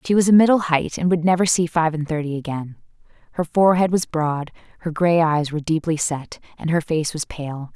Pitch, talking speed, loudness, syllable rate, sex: 160 Hz, 215 wpm, -20 LUFS, 5.6 syllables/s, female